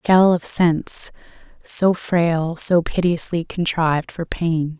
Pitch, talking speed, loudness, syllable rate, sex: 170 Hz, 125 wpm, -19 LUFS, 3.6 syllables/s, female